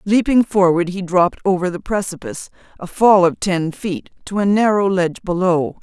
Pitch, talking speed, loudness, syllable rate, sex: 185 Hz, 175 wpm, -17 LUFS, 5.2 syllables/s, female